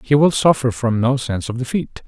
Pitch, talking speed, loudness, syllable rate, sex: 125 Hz, 230 wpm, -18 LUFS, 5.6 syllables/s, male